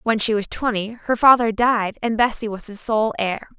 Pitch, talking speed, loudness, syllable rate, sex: 220 Hz, 220 wpm, -20 LUFS, 4.9 syllables/s, female